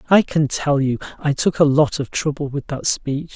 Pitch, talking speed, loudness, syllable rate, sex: 145 Hz, 235 wpm, -19 LUFS, 4.8 syllables/s, male